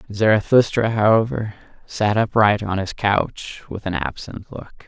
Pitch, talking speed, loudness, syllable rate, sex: 105 Hz, 135 wpm, -19 LUFS, 4.3 syllables/s, male